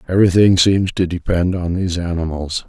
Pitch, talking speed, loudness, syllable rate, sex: 90 Hz, 155 wpm, -16 LUFS, 5.6 syllables/s, male